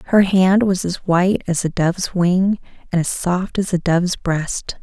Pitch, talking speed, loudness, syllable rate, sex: 180 Hz, 200 wpm, -18 LUFS, 4.5 syllables/s, female